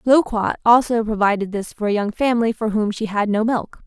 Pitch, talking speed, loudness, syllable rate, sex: 220 Hz, 220 wpm, -19 LUFS, 5.6 syllables/s, female